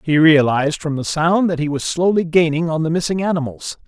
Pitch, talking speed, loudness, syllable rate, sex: 160 Hz, 215 wpm, -17 LUFS, 5.7 syllables/s, male